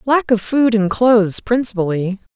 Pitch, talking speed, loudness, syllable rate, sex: 220 Hz, 155 wpm, -16 LUFS, 4.7 syllables/s, female